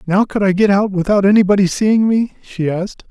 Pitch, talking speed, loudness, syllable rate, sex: 195 Hz, 215 wpm, -15 LUFS, 5.6 syllables/s, male